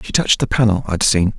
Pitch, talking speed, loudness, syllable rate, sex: 105 Hz, 260 wpm, -16 LUFS, 6.5 syllables/s, male